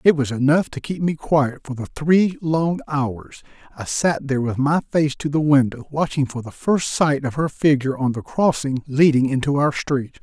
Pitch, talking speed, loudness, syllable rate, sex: 145 Hz, 210 wpm, -20 LUFS, 4.8 syllables/s, male